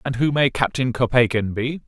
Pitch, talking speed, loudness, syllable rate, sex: 125 Hz, 190 wpm, -20 LUFS, 5.2 syllables/s, male